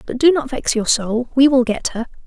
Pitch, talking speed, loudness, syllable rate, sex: 250 Hz, 265 wpm, -17 LUFS, 5.2 syllables/s, female